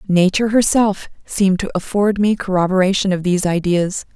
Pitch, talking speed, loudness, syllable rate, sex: 195 Hz, 145 wpm, -17 LUFS, 5.6 syllables/s, female